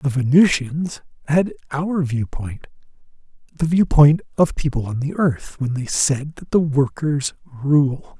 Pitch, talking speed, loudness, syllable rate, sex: 145 Hz, 130 wpm, -19 LUFS, 3.9 syllables/s, male